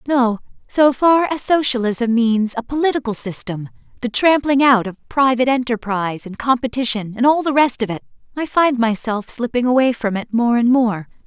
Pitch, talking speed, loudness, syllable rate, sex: 245 Hz, 160 wpm, -17 LUFS, 5.1 syllables/s, female